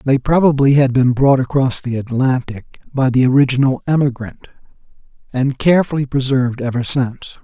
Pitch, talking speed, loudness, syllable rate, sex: 130 Hz, 135 wpm, -15 LUFS, 5.6 syllables/s, male